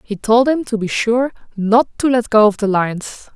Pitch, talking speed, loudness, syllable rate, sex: 225 Hz, 235 wpm, -16 LUFS, 4.8 syllables/s, female